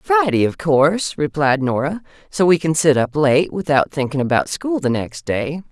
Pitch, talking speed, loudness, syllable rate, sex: 155 Hz, 190 wpm, -18 LUFS, 4.7 syllables/s, female